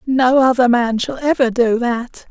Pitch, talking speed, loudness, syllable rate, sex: 245 Hz, 180 wpm, -15 LUFS, 4.2 syllables/s, male